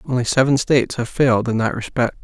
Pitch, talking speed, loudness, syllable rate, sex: 120 Hz, 215 wpm, -18 LUFS, 6.5 syllables/s, male